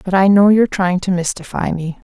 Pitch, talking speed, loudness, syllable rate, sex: 185 Hz, 230 wpm, -15 LUFS, 5.7 syllables/s, female